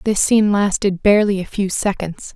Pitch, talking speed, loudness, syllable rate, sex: 200 Hz, 180 wpm, -17 LUFS, 5.4 syllables/s, female